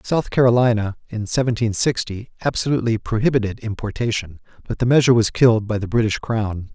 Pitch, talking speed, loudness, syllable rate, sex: 115 Hz, 150 wpm, -19 LUFS, 6.0 syllables/s, male